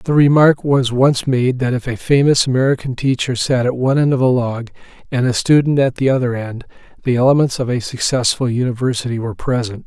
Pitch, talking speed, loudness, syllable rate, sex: 130 Hz, 200 wpm, -16 LUFS, 5.7 syllables/s, male